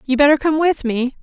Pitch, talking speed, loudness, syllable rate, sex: 280 Hz, 245 wpm, -16 LUFS, 5.6 syllables/s, female